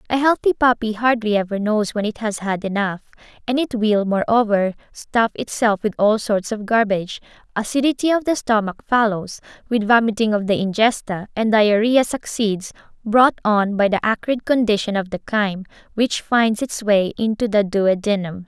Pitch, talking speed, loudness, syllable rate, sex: 215 Hz, 165 wpm, -19 LUFS, 4.9 syllables/s, female